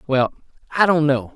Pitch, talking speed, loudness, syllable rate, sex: 145 Hz, 180 wpm, -19 LUFS, 5.1 syllables/s, male